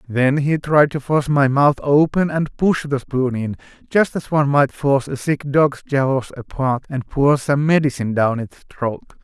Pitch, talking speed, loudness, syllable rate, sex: 140 Hz, 195 wpm, -18 LUFS, 4.6 syllables/s, male